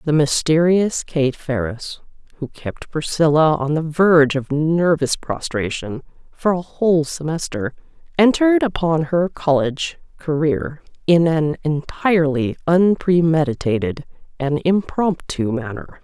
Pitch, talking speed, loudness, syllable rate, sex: 155 Hz, 110 wpm, -18 LUFS, 4.2 syllables/s, female